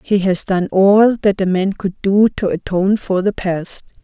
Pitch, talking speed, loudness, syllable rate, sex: 195 Hz, 210 wpm, -16 LUFS, 4.3 syllables/s, female